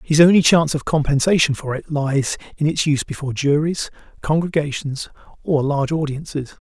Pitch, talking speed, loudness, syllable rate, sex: 150 Hz, 155 wpm, -19 LUFS, 5.6 syllables/s, male